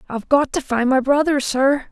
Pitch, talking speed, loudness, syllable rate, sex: 270 Hz, 220 wpm, -18 LUFS, 5.2 syllables/s, female